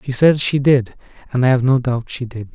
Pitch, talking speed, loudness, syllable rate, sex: 130 Hz, 260 wpm, -16 LUFS, 5.4 syllables/s, male